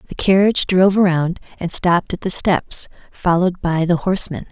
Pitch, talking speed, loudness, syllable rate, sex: 180 Hz, 175 wpm, -17 LUFS, 5.4 syllables/s, female